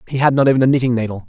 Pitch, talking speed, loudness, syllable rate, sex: 125 Hz, 330 wpm, -15 LUFS, 8.9 syllables/s, male